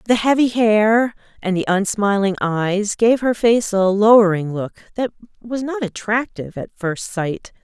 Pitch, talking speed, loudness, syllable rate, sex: 210 Hz, 155 wpm, -18 LUFS, 4.4 syllables/s, female